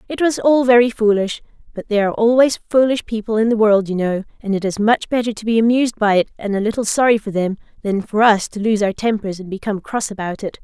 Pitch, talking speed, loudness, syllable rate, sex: 215 Hz, 250 wpm, -17 LUFS, 6.3 syllables/s, female